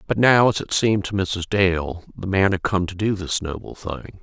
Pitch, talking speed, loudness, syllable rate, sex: 95 Hz, 240 wpm, -21 LUFS, 4.8 syllables/s, male